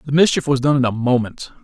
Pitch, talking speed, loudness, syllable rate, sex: 130 Hz, 260 wpm, -17 LUFS, 6.4 syllables/s, male